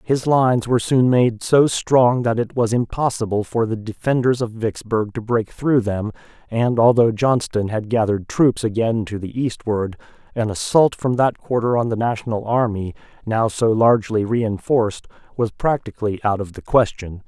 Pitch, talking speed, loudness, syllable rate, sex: 115 Hz, 170 wpm, -19 LUFS, 4.8 syllables/s, male